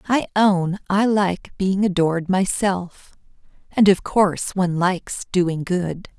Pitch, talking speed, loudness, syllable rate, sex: 185 Hz, 125 wpm, -20 LUFS, 4.0 syllables/s, female